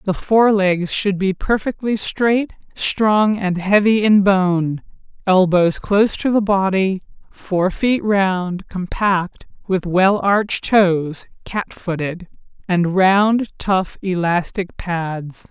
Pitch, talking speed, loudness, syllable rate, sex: 190 Hz, 125 wpm, -17 LUFS, 3.2 syllables/s, female